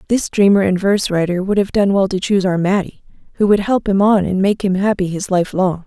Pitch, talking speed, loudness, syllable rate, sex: 195 Hz, 245 wpm, -16 LUFS, 5.8 syllables/s, female